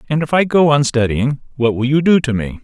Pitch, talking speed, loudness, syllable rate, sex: 135 Hz, 275 wpm, -15 LUFS, 5.6 syllables/s, male